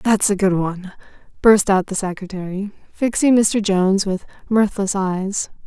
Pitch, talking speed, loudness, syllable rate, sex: 195 Hz, 150 wpm, -18 LUFS, 4.6 syllables/s, female